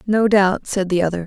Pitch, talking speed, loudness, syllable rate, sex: 195 Hz, 240 wpm, -17 LUFS, 5.3 syllables/s, female